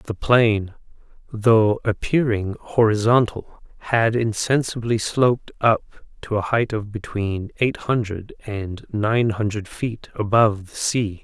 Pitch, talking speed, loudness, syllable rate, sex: 110 Hz, 125 wpm, -21 LUFS, 3.7 syllables/s, male